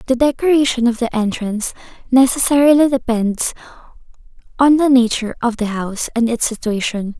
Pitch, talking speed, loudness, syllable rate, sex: 245 Hz, 135 wpm, -16 LUFS, 5.7 syllables/s, female